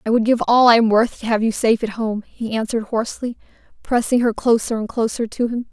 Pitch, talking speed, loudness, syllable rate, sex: 230 Hz, 240 wpm, -19 LUFS, 6.1 syllables/s, female